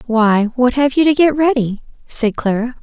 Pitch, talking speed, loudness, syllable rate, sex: 250 Hz, 190 wpm, -15 LUFS, 4.6 syllables/s, female